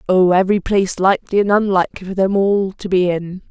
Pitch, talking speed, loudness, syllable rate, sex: 190 Hz, 205 wpm, -16 LUFS, 6.1 syllables/s, female